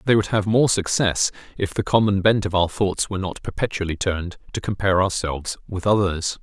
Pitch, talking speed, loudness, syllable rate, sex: 95 Hz, 195 wpm, -21 LUFS, 5.7 syllables/s, male